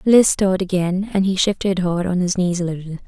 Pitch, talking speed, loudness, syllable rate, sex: 185 Hz, 235 wpm, -19 LUFS, 5.7 syllables/s, female